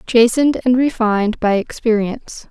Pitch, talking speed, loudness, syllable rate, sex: 230 Hz, 120 wpm, -16 LUFS, 5.1 syllables/s, female